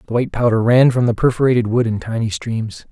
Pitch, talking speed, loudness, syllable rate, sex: 115 Hz, 225 wpm, -17 LUFS, 6.3 syllables/s, male